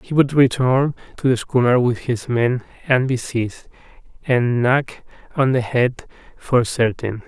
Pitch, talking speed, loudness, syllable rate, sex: 125 Hz, 155 wpm, -19 LUFS, 4.3 syllables/s, male